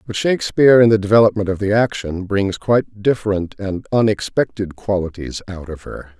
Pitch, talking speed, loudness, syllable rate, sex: 105 Hz, 165 wpm, -17 LUFS, 5.5 syllables/s, male